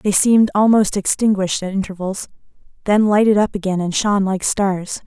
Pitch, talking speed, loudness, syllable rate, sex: 200 Hz, 165 wpm, -17 LUFS, 5.6 syllables/s, female